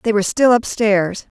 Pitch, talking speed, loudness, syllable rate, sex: 215 Hz, 175 wpm, -16 LUFS, 5.0 syllables/s, female